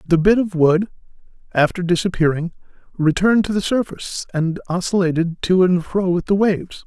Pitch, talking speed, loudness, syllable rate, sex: 180 Hz, 155 wpm, -18 LUFS, 5.4 syllables/s, male